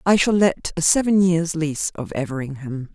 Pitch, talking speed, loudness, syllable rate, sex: 165 Hz, 185 wpm, -20 LUFS, 5.1 syllables/s, female